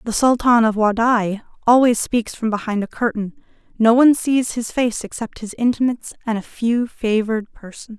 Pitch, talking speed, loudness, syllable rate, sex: 230 Hz, 175 wpm, -18 LUFS, 5.1 syllables/s, female